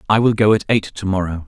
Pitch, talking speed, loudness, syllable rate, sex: 100 Hz, 285 wpm, -17 LUFS, 6.5 syllables/s, male